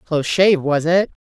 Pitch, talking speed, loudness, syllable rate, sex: 165 Hz, 245 wpm, -16 LUFS, 6.9 syllables/s, female